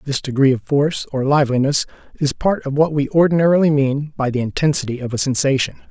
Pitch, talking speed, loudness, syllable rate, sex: 140 Hz, 195 wpm, -18 LUFS, 6.3 syllables/s, male